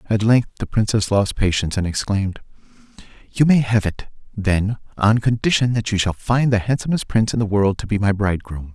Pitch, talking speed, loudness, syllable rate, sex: 105 Hz, 200 wpm, -19 LUFS, 5.7 syllables/s, male